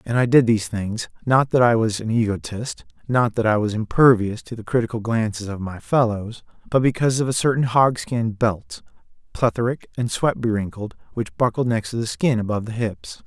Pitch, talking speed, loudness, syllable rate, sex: 115 Hz, 190 wpm, -21 LUFS, 5.3 syllables/s, male